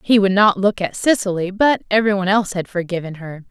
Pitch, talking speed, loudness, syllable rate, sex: 195 Hz, 220 wpm, -17 LUFS, 6.4 syllables/s, female